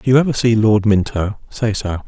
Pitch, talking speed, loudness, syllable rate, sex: 110 Hz, 230 wpm, -16 LUFS, 5.3 syllables/s, male